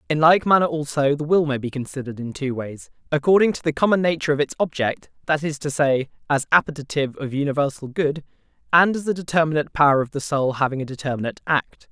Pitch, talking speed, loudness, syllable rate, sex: 150 Hz, 195 wpm, -21 LUFS, 6.6 syllables/s, male